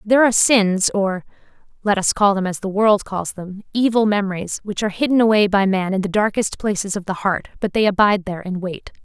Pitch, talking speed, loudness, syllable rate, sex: 200 Hz, 225 wpm, -18 LUFS, 5.1 syllables/s, female